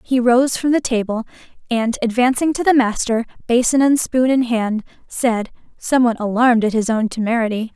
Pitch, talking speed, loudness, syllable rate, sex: 240 Hz, 170 wpm, -17 LUFS, 5.2 syllables/s, female